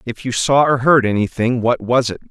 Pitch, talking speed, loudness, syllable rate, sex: 120 Hz, 235 wpm, -16 LUFS, 5.3 syllables/s, male